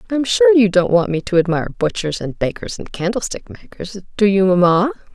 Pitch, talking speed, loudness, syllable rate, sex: 195 Hz, 200 wpm, -16 LUFS, 5.6 syllables/s, female